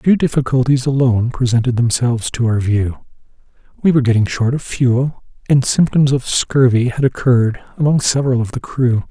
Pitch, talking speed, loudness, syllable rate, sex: 125 Hz, 165 wpm, -15 LUFS, 5.5 syllables/s, male